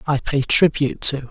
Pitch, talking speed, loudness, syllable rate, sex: 140 Hz, 185 wpm, -17 LUFS, 4.9 syllables/s, male